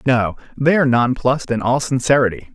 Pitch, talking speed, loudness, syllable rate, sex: 130 Hz, 165 wpm, -17 LUFS, 5.9 syllables/s, male